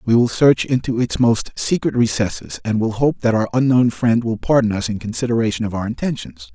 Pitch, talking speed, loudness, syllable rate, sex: 115 Hz, 210 wpm, -18 LUFS, 5.6 syllables/s, male